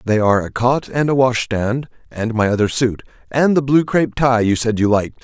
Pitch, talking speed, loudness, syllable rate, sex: 120 Hz, 240 wpm, -17 LUFS, 5.4 syllables/s, male